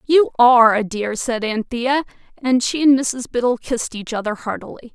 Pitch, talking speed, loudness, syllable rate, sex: 245 Hz, 180 wpm, -18 LUFS, 5.1 syllables/s, female